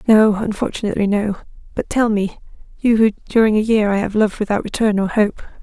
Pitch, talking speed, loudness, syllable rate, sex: 210 Hz, 190 wpm, -17 LUFS, 6.2 syllables/s, female